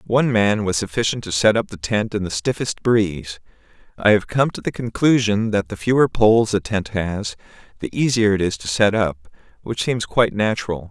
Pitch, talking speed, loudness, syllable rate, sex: 105 Hz, 205 wpm, -19 LUFS, 5.4 syllables/s, male